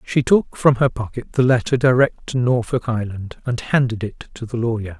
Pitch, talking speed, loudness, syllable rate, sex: 120 Hz, 205 wpm, -19 LUFS, 5.2 syllables/s, male